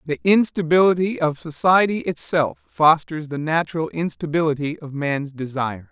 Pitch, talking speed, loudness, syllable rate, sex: 160 Hz, 120 wpm, -20 LUFS, 4.9 syllables/s, male